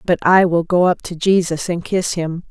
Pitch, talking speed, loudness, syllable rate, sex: 175 Hz, 240 wpm, -17 LUFS, 4.7 syllables/s, female